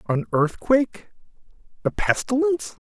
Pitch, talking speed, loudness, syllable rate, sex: 200 Hz, 85 wpm, -22 LUFS, 5.0 syllables/s, male